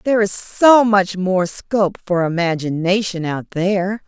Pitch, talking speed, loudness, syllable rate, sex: 190 Hz, 145 wpm, -17 LUFS, 4.5 syllables/s, female